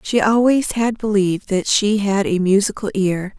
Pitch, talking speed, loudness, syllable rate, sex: 205 Hz, 175 wpm, -17 LUFS, 4.6 syllables/s, female